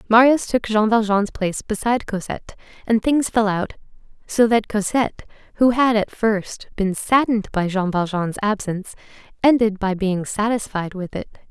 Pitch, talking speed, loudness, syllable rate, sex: 210 Hz, 155 wpm, -20 LUFS, 5.1 syllables/s, female